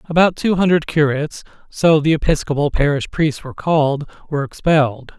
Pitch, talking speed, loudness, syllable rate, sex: 150 Hz, 125 wpm, -17 LUFS, 5.8 syllables/s, male